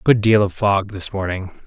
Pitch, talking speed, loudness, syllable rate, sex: 100 Hz, 215 wpm, -19 LUFS, 4.8 syllables/s, male